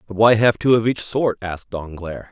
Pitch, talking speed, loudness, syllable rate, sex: 105 Hz, 235 wpm, -18 LUFS, 5.2 syllables/s, male